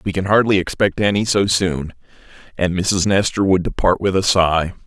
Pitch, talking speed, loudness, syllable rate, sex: 95 Hz, 185 wpm, -17 LUFS, 5.0 syllables/s, male